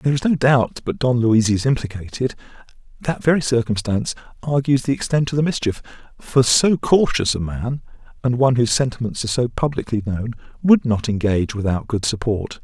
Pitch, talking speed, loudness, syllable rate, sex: 125 Hz, 175 wpm, -19 LUFS, 5.8 syllables/s, male